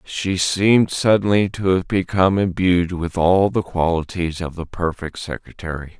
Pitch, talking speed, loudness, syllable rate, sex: 90 Hz, 150 wpm, -19 LUFS, 4.6 syllables/s, male